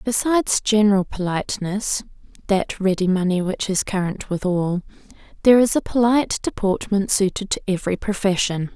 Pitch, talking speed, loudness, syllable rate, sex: 200 Hz, 135 wpm, -20 LUFS, 5.4 syllables/s, female